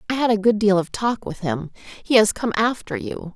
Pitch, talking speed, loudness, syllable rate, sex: 205 Hz, 250 wpm, -21 LUFS, 5.0 syllables/s, female